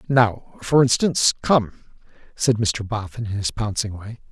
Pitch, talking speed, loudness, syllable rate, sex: 110 Hz, 140 wpm, -21 LUFS, 4.5 syllables/s, male